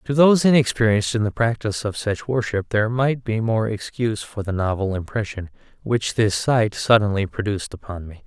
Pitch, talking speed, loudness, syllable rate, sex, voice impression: 110 Hz, 180 wpm, -21 LUFS, 5.7 syllables/s, male, masculine, adult-like, tensed, slightly weak, slightly bright, fluent, intellectual, calm, slightly wild, kind, modest